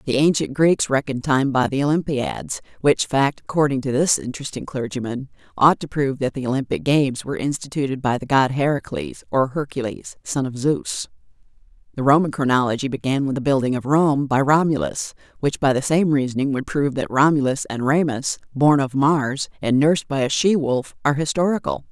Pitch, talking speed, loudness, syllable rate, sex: 140 Hz, 180 wpm, -20 LUFS, 5.5 syllables/s, female